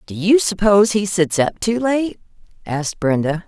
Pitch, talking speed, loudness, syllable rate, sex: 195 Hz, 175 wpm, -17 LUFS, 4.9 syllables/s, female